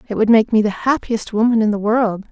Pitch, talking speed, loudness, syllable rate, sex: 220 Hz, 260 wpm, -16 LUFS, 5.7 syllables/s, female